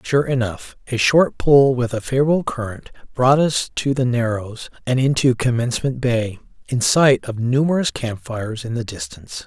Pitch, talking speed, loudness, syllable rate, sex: 120 Hz, 170 wpm, -19 LUFS, 4.9 syllables/s, male